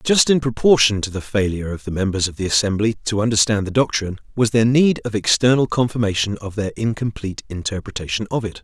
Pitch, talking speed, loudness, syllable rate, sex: 110 Hz, 195 wpm, -19 LUFS, 6.2 syllables/s, male